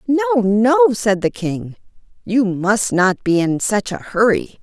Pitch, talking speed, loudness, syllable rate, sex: 220 Hz, 170 wpm, -17 LUFS, 3.6 syllables/s, female